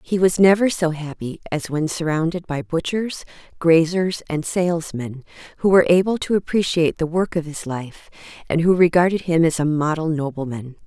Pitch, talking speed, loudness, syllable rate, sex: 165 Hz, 170 wpm, -20 LUFS, 5.2 syllables/s, female